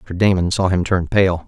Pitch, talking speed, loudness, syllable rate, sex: 90 Hz, 245 wpm, -17 LUFS, 5.0 syllables/s, male